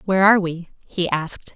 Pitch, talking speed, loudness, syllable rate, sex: 180 Hz, 195 wpm, -19 LUFS, 6.6 syllables/s, female